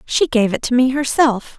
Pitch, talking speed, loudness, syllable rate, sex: 255 Hz, 225 wpm, -16 LUFS, 4.7 syllables/s, female